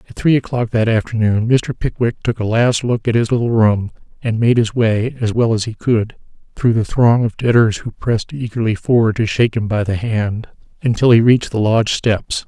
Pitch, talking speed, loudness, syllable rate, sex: 115 Hz, 215 wpm, -16 LUFS, 5.3 syllables/s, male